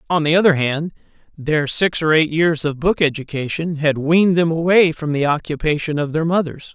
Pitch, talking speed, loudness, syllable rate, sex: 155 Hz, 195 wpm, -17 LUFS, 5.2 syllables/s, male